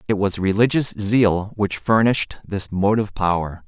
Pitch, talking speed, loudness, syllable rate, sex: 100 Hz, 145 wpm, -20 LUFS, 4.6 syllables/s, male